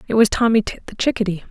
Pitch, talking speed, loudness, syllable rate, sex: 215 Hz, 240 wpm, -18 LUFS, 7.1 syllables/s, female